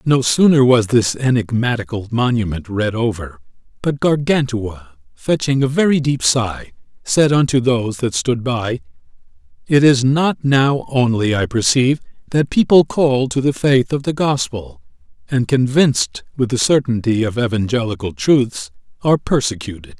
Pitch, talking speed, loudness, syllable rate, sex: 120 Hz, 140 wpm, -16 LUFS, 4.7 syllables/s, male